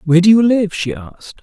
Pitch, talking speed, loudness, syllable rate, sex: 185 Hz, 255 wpm, -13 LUFS, 6.4 syllables/s, male